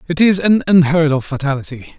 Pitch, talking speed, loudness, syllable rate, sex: 160 Hz, 180 wpm, -14 LUFS, 5.7 syllables/s, male